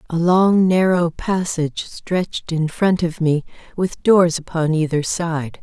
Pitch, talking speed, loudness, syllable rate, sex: 170 Hz, 150 wpm, -18 LUFS, 3.9 syllables/s, female